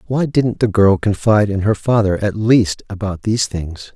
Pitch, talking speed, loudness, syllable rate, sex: 105 Hz, 195 wpm, -16 LUFS, 4.9 syllables/s, male